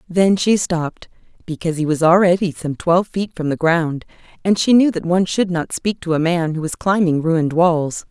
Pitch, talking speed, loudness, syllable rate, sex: 170 Hz, 215 wpm, -17 LUFS, 5.3 syllables/s, female